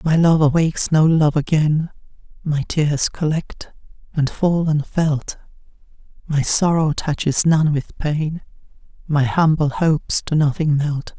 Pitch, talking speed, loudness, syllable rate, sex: 155 Hz, 130 wpm, -18 LUFS, 3.9 syllables/s, female